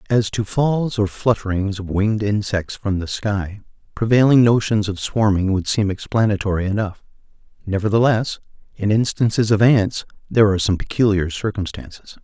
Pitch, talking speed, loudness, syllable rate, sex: 105 Hz, 140 wpm, -19 LUFS, 5.2 syllables/s, male